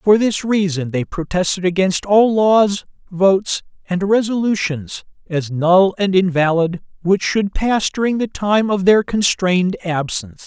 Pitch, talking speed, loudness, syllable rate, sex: 190 Hz, 145 wpm, -17 LUFS, 4.2 syllables/s, male